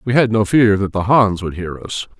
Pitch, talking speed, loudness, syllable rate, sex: 105 Hz, 275 wpm, -16 LUFS, 5.0 syllables/s, male